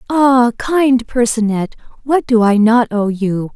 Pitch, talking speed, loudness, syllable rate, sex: 235 Hz, 150 wpm, -14 LUFS, 3.8 syllables/s, female